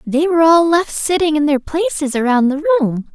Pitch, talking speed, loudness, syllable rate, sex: 290 Hz, 210 wpm, -15 LUFS, 5.2 syllables/s, female